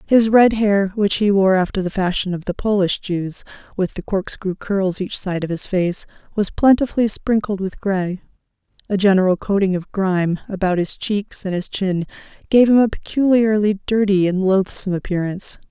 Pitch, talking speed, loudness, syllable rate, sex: 195 Hz, 170 wpm, -18 LUFS, 5.0 syllables/s, female